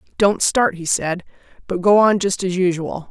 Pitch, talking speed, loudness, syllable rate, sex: 185 Hz, 195 wpm, -18 LUFS, 4.7 syllables/s, female